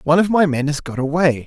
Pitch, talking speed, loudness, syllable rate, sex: 155 Hz, 285 wpm, -18 LUFS, 6.6 syllables/s, male